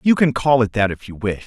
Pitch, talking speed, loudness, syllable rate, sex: 120 Hz, 325 wpm, -18 LUFS, 5.8 syllables/s, male